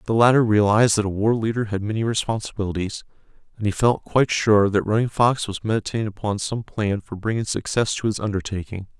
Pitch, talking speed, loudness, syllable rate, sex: 110 Hz, 195 wpm, -21 LUFS, 6.1 syllables/s, male